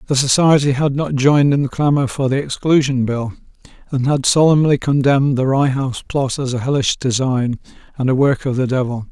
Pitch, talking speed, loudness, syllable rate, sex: 135 Hz, 200 wpm, -16 LUFS, 5.5 syllables/s, male